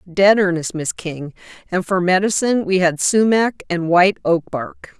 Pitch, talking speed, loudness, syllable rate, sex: 185 Hz, 170 wpm, -17 LUFS, 4.6 syllables/s, female